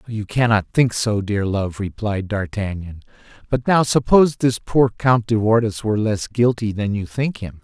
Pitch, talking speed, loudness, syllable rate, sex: 110 Hz, 180 wpm, -19 LUFS, 4.7 syllables/s, male